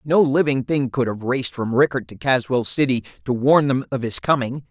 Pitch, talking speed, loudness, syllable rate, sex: 130 Hz, 215 wpm, -20 LUFS, 5.4 syllables/s, male